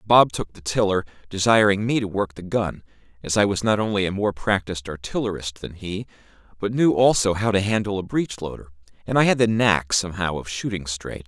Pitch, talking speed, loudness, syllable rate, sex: 100 Hz, 210 wpm, -22 LUFS, 5.6 syllables/s, male